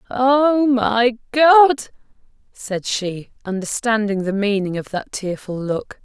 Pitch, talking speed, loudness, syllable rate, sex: 225 Hz, 120 wpm, -18 LUFS, 3.5 syllables/s, female